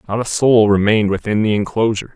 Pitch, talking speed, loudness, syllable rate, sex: 110 Hz, 195 wpm, -15 LUFS, 6.6 syllables/s, male